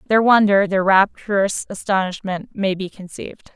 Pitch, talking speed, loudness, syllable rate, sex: 195 Hz, 100 wpm, -18 LUFS, 4.9 syllables/s, female